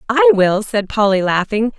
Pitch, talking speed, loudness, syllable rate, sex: 220 Hz, 170 wpm, -15 LUFS, 4.6 syllables/s, female